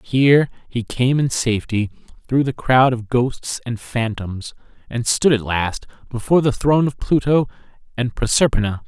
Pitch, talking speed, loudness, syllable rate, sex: 125 Hz, 155 wpm, -19 LUFS, 4.7 syllables/s, male